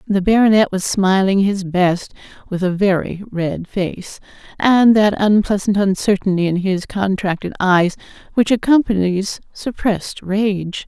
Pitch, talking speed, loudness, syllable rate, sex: 195 Hz, 125 wpm, -17 LUFS, 4.2 syllables/s, female